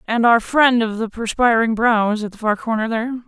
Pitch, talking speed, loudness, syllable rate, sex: 225 Hz, 240 wpm, -18 LUFS, 5.7 syllables/s, female